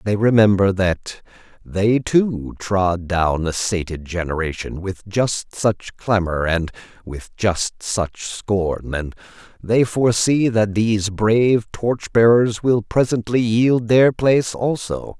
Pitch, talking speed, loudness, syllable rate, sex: 105 Hz, 130 wpm, -19 LUFS, 3.6 syllables/s, male